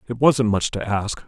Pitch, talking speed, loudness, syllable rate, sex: 110 Hz, 235 wpm, -21 LUFS, 4.7 syllables/s, male